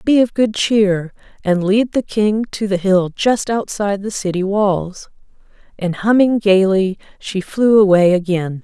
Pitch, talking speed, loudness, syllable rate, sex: 200 Hz, 160 wpm, -16 LUFS, 4.1 syllables/s, female